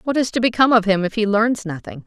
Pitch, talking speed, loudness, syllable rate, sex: 220 Hz, 290 wpm, -18 LUFS, 6.6 syllables/s, female